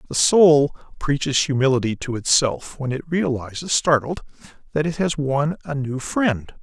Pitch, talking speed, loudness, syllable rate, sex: 140 Hz, 155 wpm, -20 LUFS, 4.5 syllables/s, male